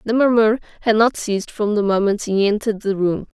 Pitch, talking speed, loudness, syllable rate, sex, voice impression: 210 Hz, 215 wpm, -18 LUFS, 5.9 syllables/s, female, very feminine, very young, very thin, slightly tensed, slightly relaxed, slightly powerful, slightly weak, dark, hard, clear, slightly fluent, cute, very intellectual, refreshing, sincere, very calm, friendly, reassuring, very unique, slightly elegant, sweet, slightly lively, kind, very strict, very intense, very sharp, very modest, light